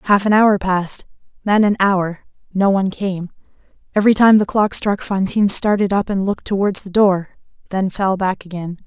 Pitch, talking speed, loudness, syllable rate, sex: 195 Hz, 185 wpm, -17 LUFS, 5.3 syllables/s, female